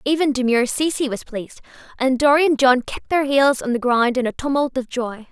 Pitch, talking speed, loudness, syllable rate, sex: 260 Hz, 225 wpm, -19 LUFS, 5.8 syllables/s, female